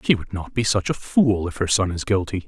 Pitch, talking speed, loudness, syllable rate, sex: 100 Hz, 290 wpm, -21 LUFS, 5.5 syllables/s, male